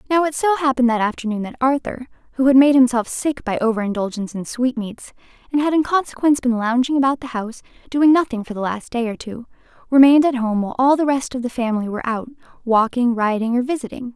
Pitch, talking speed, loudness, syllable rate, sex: 250 Hz, 215 wpm, -19 LUFS, 6.6 syllables/s, female